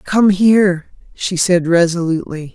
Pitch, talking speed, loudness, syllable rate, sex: 180 Hz, 120 wpm, -14 LUFS, 4.4 syllables/s, female